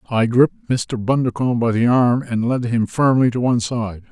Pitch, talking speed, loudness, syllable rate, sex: 120 Hz, 205 wpm, -18 LUFS, 5.4 syllables/s, male